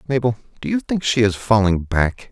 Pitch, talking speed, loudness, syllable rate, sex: 115 Hz, 210 wpm, -19 LUFS, 5.2 syllables/s, male